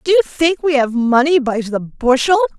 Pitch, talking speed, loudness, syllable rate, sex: 285 Hz, 210 wpm, -15 LUFS, 4.5 syllables/s, female